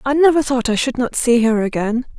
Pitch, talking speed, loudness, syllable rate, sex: 250 Hz, 245 wpm, -16 LUFS, 5.6 syllables/s, female